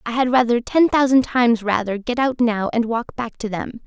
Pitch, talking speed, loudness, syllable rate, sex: 235 Hz, 235 wpm, -19 LUFS, 5.1 syllables/s, female